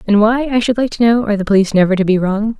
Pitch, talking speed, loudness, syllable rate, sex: 215 Hz, 325 wpm, -14 LUFS, 7.4 syllables/s, female